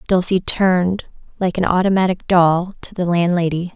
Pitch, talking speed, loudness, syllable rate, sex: 180 Hz, 145 wpm, -17 LUFS, 5.0 syllables/s, female